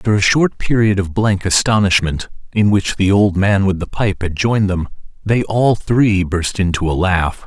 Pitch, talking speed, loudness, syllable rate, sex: 100 Hz, 200 wpm, -15 LUFS, 4.7 syllables/s, male